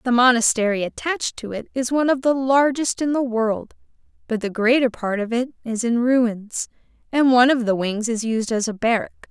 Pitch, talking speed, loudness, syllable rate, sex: 240 Hz, 205 wpm, -20 LUFS, 5.3 syllables/s, female